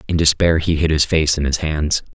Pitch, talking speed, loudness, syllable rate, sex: 80 Hz, 250 wpm, -17 LUFS, 5.3 syllables/s, male